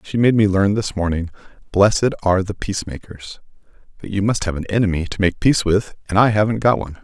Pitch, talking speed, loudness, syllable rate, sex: 100 Hz, 205 wpm, -18 LUFS, 6.3 syllables/s, male